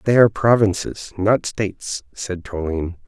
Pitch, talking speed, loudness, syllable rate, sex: 100 Hz, 135 wpm, -20 LUFS, 4.8 syllables/s, male